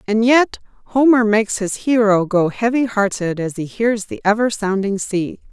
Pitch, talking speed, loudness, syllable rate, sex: 215 Hz, 175 wpm, -17 LUFS, 4.7 syllables/s, female